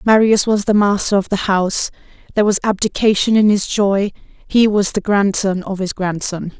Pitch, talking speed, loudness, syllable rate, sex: 200 Hz, 180 wpm, -16 LUFS, 4.9 syllables/s, female